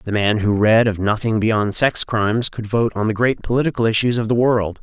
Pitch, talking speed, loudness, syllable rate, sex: 110 Hz, 235 wpm, -18 LUFS, 5.3 syllables/s, male